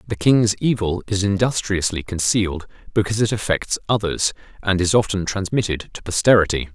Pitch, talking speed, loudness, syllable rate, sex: 100 Hz, 140 wpm, -20 LUFS, 5.4 syllables/s, male